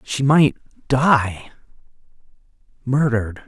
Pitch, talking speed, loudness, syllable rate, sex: 130 Hz, 70 wpm, -18 LUFS, 2.9 syllables/s, male